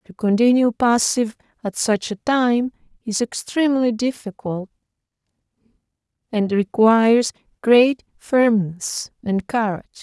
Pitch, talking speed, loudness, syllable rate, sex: 225 Hz, 95 wpm, -19 LUFS, 4.2 syllables/s, female